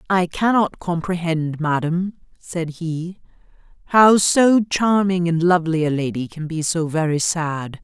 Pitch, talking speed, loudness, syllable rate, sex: 170 Hz, 140 wpm, -19 LUFS, 4.0 syllables/s, female